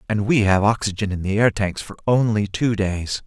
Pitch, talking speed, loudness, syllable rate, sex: 105 Hz, 220 wpm, -20 LUFS, 5.0 syllables/s, male